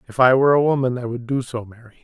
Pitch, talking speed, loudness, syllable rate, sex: 125 Hz, 295 wpm, -18 LUFS, 7.7 syllables/s, male